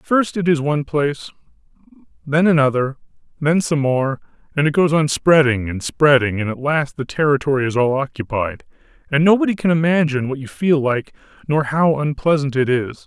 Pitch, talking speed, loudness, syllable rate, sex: 145 Hz, 175 wpm, -18 LUFS, 5.3 syllables/s, male